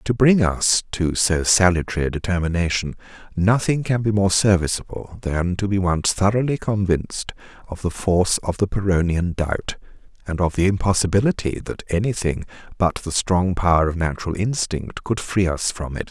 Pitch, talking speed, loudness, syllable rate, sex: 95 Hz, 165 wpm, -20 LUFS, 5.1 syllables/s, male